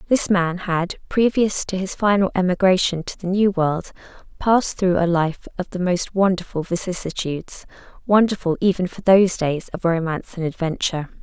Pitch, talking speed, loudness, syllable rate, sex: 180 Hz, 155 wpm, -20 LUFS, 5.3 syllables/s, female